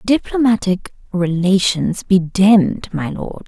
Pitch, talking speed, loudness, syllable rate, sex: 195 Hz, 105 wpm, -16 LUFS, 3.9 syllables/s, female